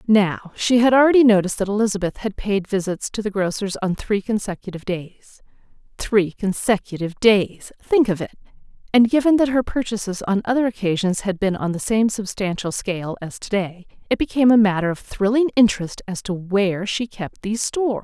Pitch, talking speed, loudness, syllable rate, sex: 205 Hz, 185 wpm, -20 LUFS, 5.2 syllables/s, female